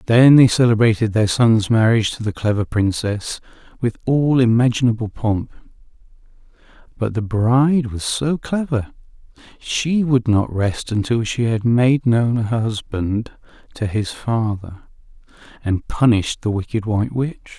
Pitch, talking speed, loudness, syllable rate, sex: 115 Hz, 135 wpm, -18 LUFS, 4.4 syllables/s, male